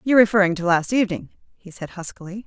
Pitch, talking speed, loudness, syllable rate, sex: 195 Hz, 195 wpm, -20 LUFS, 7.0 syllables/s, female